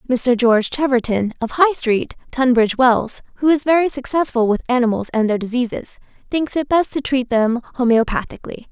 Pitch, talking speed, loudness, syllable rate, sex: 255 Hz, 165 wpm, -17 LUFS, 5.5 syllables/s, female